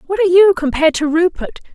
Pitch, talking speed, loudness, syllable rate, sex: 340 Hz, 205 wpm, -13 LUFS, 7.5 syllables/s, female